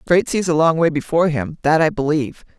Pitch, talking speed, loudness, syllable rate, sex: 165 Hz, 255 wpm, -17 LUFS, 7.1 syllables/s, female